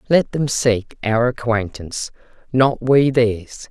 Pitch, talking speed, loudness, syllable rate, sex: 120 Hz, 130 wpm, -18 LUFS, 3.6 syllables/s, female